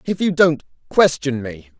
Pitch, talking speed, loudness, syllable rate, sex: 145 Hz, 165 wpm, -18 LUFS, 4.3 syllables/s, male